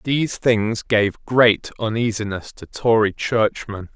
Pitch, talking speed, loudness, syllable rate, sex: 110 Hz, 120 wpm, -19 LUFS, 3.7 syllables/s, male